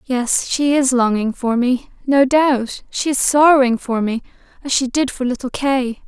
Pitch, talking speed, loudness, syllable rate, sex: 260 Hz, 190 wpm, -17 LUFS, 4.3 syllables/s, female